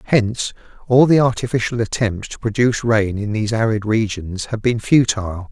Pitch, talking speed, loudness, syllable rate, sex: 110 Hz, 165 wpm, -18 LUFS, 5.4 syllables/s, male